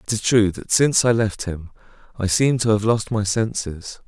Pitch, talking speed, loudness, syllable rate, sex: 105 Hz, 220 wpm, -20 LUFS, 5.0 syllables/s, male